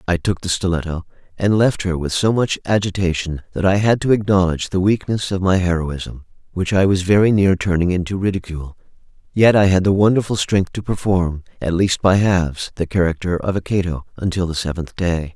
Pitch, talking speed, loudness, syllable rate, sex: 90 Hz, 195 wpm, -18 LUFS, 5.6 syllables/s, male